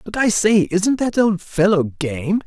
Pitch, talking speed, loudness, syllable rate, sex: 195 Hz, 195 wpm, -18 LUFS, 3.8 syllables/s, male